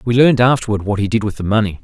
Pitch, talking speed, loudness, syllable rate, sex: 110 Hz, 295 wpm, -15 LUFS, 7.5 syllables/s, male